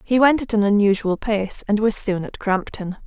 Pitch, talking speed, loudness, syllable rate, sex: 210 Hz, 215 wpm, -20 LUFS, 4.9 syllables/s, female